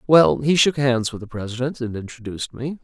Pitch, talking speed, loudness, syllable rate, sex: 125 Hz, 210 wpm, -21 LUFS, 5.6 syllables/s, male